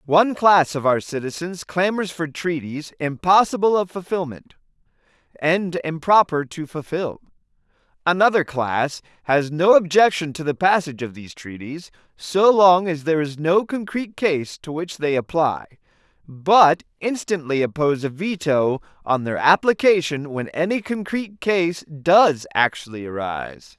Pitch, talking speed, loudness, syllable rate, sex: 165 Hz, 135 wpm, -20 LUFS, 4.6 syllables/s, male